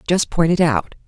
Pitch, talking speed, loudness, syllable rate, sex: 165 Hz, 225 wpm, -18 LUFS, 4.9 syllables/s, female